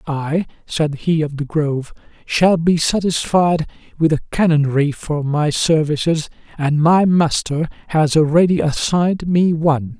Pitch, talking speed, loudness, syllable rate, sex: 160 Hz, 140 wpm, -17 LUFS, 4.3 syllables/s, male